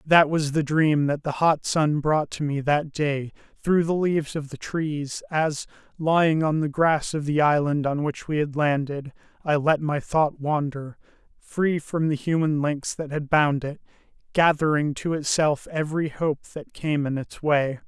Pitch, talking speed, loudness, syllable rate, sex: 150 Hz, 190 wpm, -24 LUFS, 4.3 syllables/s, male